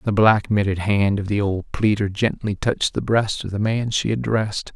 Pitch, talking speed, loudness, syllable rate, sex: 105 Hz, 215 wpm, -21 LUFS, 5.0 syllables/s, male